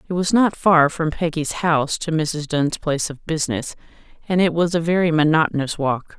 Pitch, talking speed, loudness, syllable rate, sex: 160 Hz, 195 wpm, -19 LUFS, 5.3 syllables/s, female